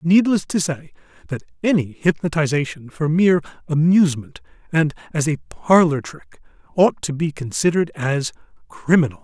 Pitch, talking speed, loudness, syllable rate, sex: 160 Hz, 130 wpm, -19 LUFS, 5.1 syllables/s, male